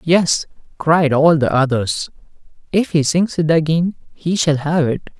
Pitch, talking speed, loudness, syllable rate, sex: 155 Hz, 160 wpm, -17 LUFS, 4.0 syllables/s, male